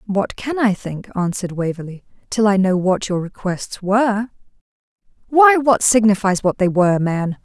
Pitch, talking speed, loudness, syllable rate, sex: 205 Hz, 160 wpm, -17 LUFS, 4.8 syllables/s, female